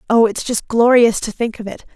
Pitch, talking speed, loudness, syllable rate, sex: 225 Hz, 245 wpm, -15 LUFS, 5.3 syllables/s, female